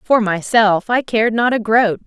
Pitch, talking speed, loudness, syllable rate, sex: 220 Hz, 205 wpm, -15 LUFS, 4.6 syllables/s, female